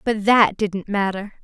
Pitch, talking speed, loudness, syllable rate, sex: 205 Hz, 165 wpm, -19 LUFS, 4.0 syllables/s, female